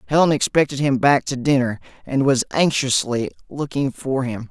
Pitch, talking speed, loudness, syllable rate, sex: 135 Hz, 160 wpm, -20 LUFS, 5.0 syllables/s, male